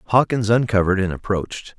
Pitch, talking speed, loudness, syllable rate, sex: 105 Hz, 135 wpm, -19 LUFS, 5.7 syllables/s, male